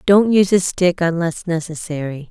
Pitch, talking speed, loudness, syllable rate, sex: 175 Hz, 155 wpm, -17 LUFS, 5.0 syllables/s, female